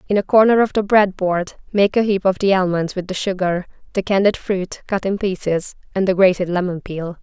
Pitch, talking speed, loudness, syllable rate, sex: 190 Hz, 225 wpm, -18 LUFS, 5.3 syllables/s, female